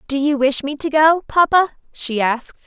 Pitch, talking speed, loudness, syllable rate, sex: 290 Hz, 200 wpm, -17 LUFS, 4.9 syllables/s, female